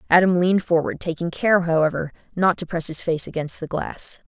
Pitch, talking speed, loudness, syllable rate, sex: 170 Hz, 195 wpm, -22 LUFS, 5.5 syllables/s, female